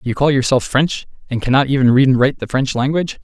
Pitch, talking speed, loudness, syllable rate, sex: 130 Hz, 240 wpm, -16 LUFS, 6.9 syllables/s, male